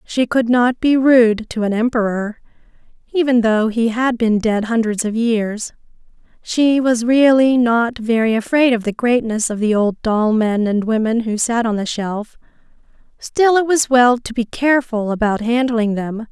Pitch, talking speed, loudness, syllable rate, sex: 230 Hz, 175 wpm, -16 LUFS, 4.4 syllables/s, female